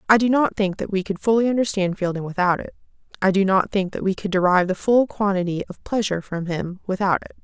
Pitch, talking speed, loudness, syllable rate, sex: 195 Hz, 235 wpm, -21 LUFS, 6.2 syllables/s, female